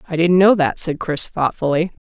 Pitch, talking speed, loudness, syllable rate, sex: 170 Hz, 205 wpm, -16 LUFS, 5.1 syllables/s, female